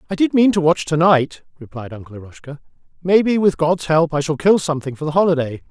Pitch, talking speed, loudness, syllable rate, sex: 160 Hz, 210 wpm, -17 LUFS, 6.1 syllables/s, male